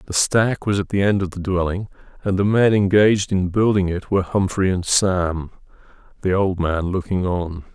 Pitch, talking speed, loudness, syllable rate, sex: 95 Hz, 195 wpm, -19 LUFS, 5.0 syllables/s, male